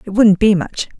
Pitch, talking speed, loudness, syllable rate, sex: 205 Hz, 240 wpm, -14 LUFS, 4.9 syllables/s, female